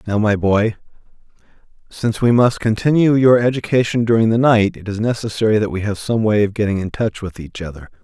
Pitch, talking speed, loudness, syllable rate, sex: 110 Hz, 200 wpm, -16 LUFS, 5.9 syllables/s, male